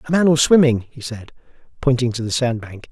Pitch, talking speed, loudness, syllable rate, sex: 125 Hz, 205 wpm, -17 LUFS, 5.7 syllables/s, male